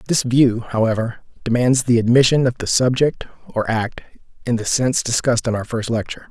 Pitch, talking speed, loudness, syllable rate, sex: 120 Hz, 180 wpm, -18 LUFS, 5.7 syllables/s, male